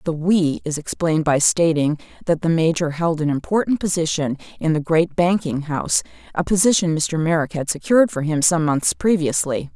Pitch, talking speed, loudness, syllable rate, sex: 165 Hz, 170 wpm, -19 LUFS, 5.3 syllables/s, female